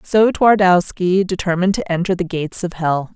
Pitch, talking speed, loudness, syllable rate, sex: 180 Hz, 170 wpm, -17 LUFS, 5.3 syllables/s, female